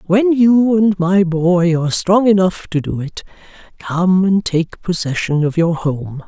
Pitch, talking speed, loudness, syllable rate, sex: 180 Hz, 170 wpm, -15 LUFS, 3.9 syllables/s, female